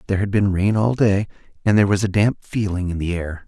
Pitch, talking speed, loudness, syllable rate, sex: 100 Hz, 260 wpm, -20 LUFS, 6.1 syllables/s, male